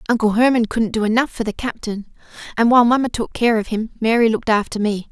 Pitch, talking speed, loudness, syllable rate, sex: 225 Hz, 225 wpm, -18 LUFS, 6.4 syllables/s, female